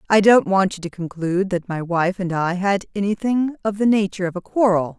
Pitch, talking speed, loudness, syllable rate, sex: 190 Hz, 230 wpm, -20 LUFS, 5.6 syllables/s, female